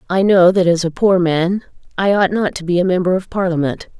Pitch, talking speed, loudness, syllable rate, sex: 180 Hz, 240 wpm, -15 LUFS, 5.6 syllables/s, female